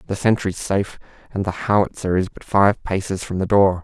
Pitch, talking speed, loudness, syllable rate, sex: 95 Hz, 205 wpm, -20 LUFS, 5.5 syllables/s, male